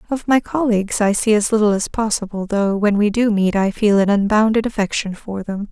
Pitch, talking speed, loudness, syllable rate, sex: 210 Hz, 220 wpm, -17 LUFS, 5.4 syllables/s, female